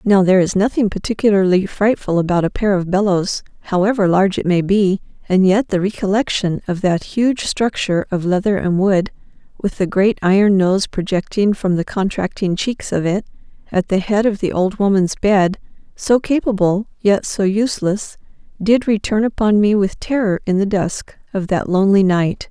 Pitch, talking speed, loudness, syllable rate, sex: 195 Hz, 175 wpm, -17 LUFS, 5.0 syllables/s, female